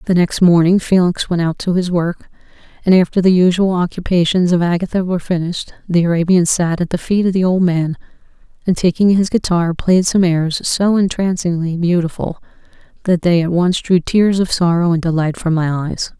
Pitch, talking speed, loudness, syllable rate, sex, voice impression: 175 Hz, 190 wpm, -15 LUFS, 5.3 syllables/s, female, very feminine, very adult-like, slightly thin, slightly relaxed, slightly weak, dark, slightly soft, muffled, slightly fluent, cool, very intellectual, slightly refreshing, sincere, very calm, very friendly, very reassuring, unique, very elegant, slightly wild, very sweet, kind, modest